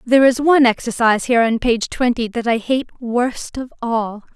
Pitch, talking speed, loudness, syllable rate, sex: 240 Hz, 195 wpm, -17 LUFS, 5.2 syllables/s, female